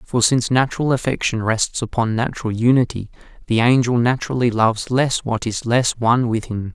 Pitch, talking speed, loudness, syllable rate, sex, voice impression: 120 Hz, 170 wpm, -19 LUFS, 5.6 syllables/s, male, masculine, adult-like, slightly thin, tensed, slightly dark, clear, slightly nasal, cool, sincere, calm, slightly unique, slightly kind, modest